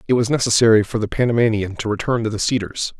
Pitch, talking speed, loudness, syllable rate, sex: 115 Hz, 220 wpm, -18 LUFS, 6.8 syllables/s, male